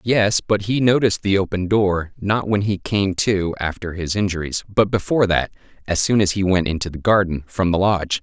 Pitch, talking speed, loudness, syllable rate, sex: 95 Hz, 210 wpm, -19 LUFS, 5.3 syllables/s, male